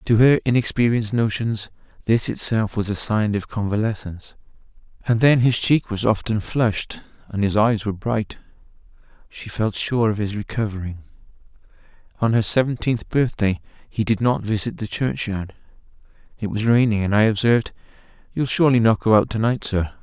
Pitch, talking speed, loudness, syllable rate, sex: 110 Hz, 155 wpm, -21 LUFS, 5.1 syllables/s, male